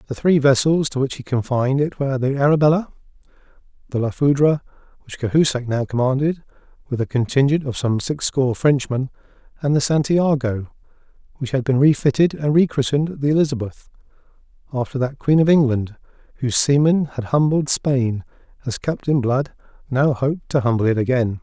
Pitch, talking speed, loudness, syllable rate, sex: 135 Hz, 155 wpm, -19 LUFS, 5.7 syllables/s, male